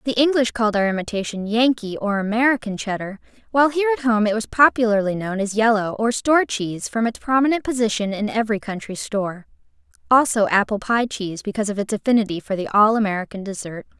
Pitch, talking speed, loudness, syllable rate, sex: 220 Hz, 185 wpm, -20 LUFS, 6.4 syllables/s, female